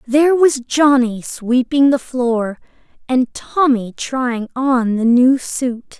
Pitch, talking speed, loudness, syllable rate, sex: 255 Hz, 130 wpm, -16 LUFS, 3.3 syllables/s, female